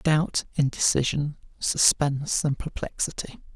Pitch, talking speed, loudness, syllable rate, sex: 145 Hz, 85 wpm, -25 LUFS, 4.2 syllables/s, male